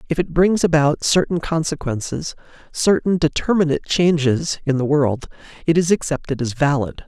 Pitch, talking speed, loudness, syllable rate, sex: 155 Hz, 145 wpm, -19 LUFS, 5.1 syllables/s, male